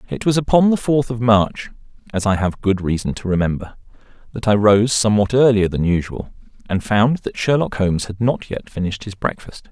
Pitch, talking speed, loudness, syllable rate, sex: 110 Hz, 200 wpm, -18 LUFS, 5.5 syllables/s, male